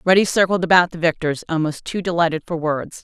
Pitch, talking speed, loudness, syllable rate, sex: 170 Hz, 200 wpm, -19 LUFS, 6.1 syllables/s, female